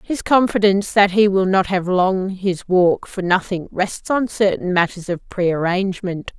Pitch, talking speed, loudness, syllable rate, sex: 190 Hz, 180 wpm, -18 LUFS, 4.5 syllables/s, female